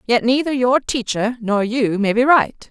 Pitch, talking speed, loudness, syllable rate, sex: 240 Hz, 200 wpm, -17 LUFS, 4.4 syllables/s, female